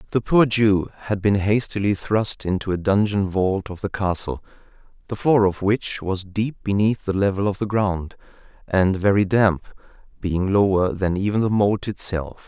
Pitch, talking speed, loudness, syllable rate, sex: 100 Hz, 175 wpm, -21 LUFS, 4.6 syllables/s, male